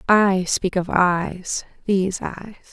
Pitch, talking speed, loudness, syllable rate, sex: 185 Hz, 110 wpm, -21 LUFS, 3.2 syllables/s, female